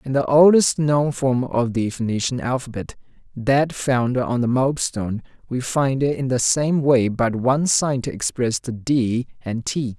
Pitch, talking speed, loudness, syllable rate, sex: 130 Hz, 180 wpm, -20 LUFS, 4.2 syllables/s, male